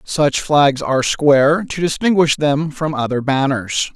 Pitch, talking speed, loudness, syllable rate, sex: 145 Hz, 150 wpm, -16 LUFS, 4.2 syllables/s, male